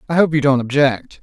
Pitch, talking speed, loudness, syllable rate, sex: 140 Hz, 245 wpm, -16 LUFS, 5.7 syllables/s, male